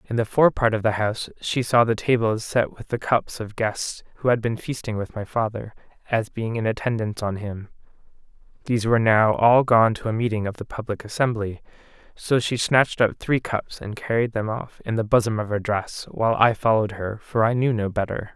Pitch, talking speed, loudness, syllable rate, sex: 110 Hz, 220 wpm, -23 LUFS, 5.4 syllables/s, male